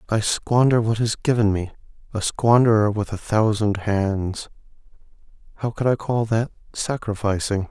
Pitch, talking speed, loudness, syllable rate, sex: 110 Hz, 130 wpm, -21 LUFS, 4.5 syllables/s, male